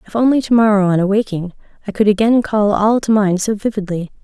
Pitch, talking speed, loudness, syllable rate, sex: 210 Hz, 215 wpm, -15 LUFS, 6.0 syllables/s, female